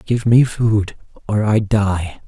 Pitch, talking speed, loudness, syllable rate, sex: 105 Hz, 160 wpm, -17 LUFS, 3.2 syllables/s, male